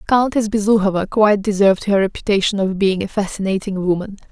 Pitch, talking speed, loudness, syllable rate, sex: 200 Hz, 155 wpm, -17 LUFS, 6.2 syllables/s, female